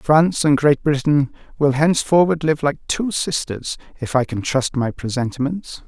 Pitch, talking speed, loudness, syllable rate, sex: 145 Hz, 165 wpm, -19 LUFS, 4.7 syllables/s, male